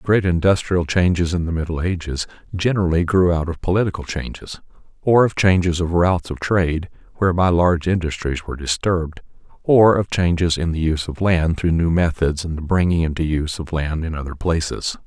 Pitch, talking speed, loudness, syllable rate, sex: 85 Hz, 185 wpm, -19 LUFS, 5.7 syllables/s, male